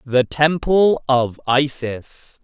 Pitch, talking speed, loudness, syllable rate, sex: 135 Hz, 100 wpm, -18 LUFS, 2.7 syllables/s, male